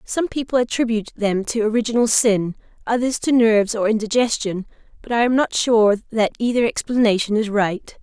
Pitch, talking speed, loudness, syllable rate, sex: 225 Hz, 165 wpm, -19 LUFS, 5.5 syllables/s, female